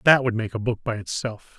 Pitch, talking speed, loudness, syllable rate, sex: 115 Hz, 265 wpm, -24 LUFS, 5.6 syllables/s, male